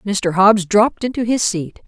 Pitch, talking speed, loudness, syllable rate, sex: 205 Hz, 190 wpm, -16 LUFS, 4.4 syllables/s, female